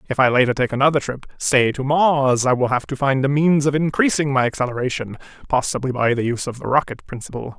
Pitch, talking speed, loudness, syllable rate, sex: 135 Hz, 220 wpm, -19 LUFS, 6.2 syllables/s, male